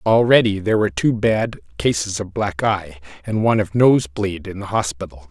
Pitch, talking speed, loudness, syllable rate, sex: 110 Hz, 180 wpm, -19 LUFS, 5.4 syllables/s, male